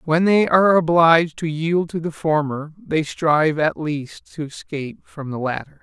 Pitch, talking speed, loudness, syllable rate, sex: 160 Hz, 185 wpm, -19 LUFS, 4.6 syllables/s, male